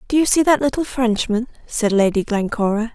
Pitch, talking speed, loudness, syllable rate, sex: 240 Hz, 185 wpm, -18 LUFS, 5.4 syllables/s, female